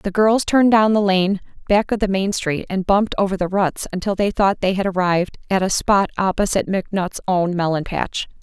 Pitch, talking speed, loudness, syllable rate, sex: 195 Hz, 215 wpm, -19 LUFS, 5.5 syllables/s, female